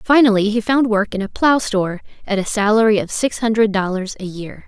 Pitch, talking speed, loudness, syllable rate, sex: 210 Hz, 220 wpm, -17 LUFS, 5.6 syllables/s, female